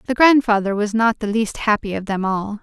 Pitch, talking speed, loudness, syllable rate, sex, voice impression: 215 Hz, 230 wpm, -18 LUFS, 5.3 syllables/s, female, feminine, adult-like, relaxed, bright, soft, clear, slightly raspy, intellectual, friendly, reassuring, elegant, slightly lively, kind